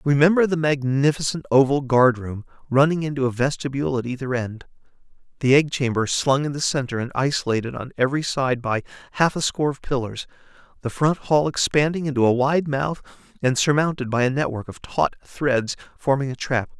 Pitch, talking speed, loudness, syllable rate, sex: 135 Hz, 180 wpm, -22 LUFS, 5.6 syllables/s, male